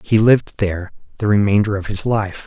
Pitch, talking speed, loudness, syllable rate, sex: 105 Hz, 195 wpm, -17 LUFS, 5.7 syllables/s, male